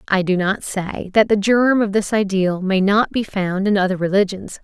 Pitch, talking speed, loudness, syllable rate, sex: 200 Hz, 220 wpm, -18 LUFS, 4.8 syllables/s, female